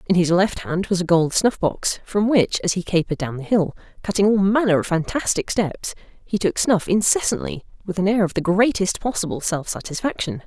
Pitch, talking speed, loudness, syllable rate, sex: 190 Hz, 205 wpm, -20 LUFS, 5.3 syllables/s, female